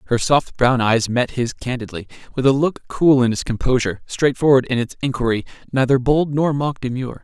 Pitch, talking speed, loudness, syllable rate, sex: 130 Hz, 190 wpm, -19 LUFS, 5.5 syllables/s, male